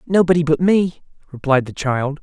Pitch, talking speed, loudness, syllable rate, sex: 155 Hz, 160 wpm, -17 LUFS, 5.0 syllables/s, male